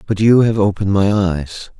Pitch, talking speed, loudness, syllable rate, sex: 100 Hz, 200 wpm, -15 LUFS, 5.0 syllables/s, male